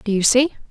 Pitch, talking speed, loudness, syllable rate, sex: 235 Hz, 255 wpm, -16 LUFS, 6.8 syllables/s, female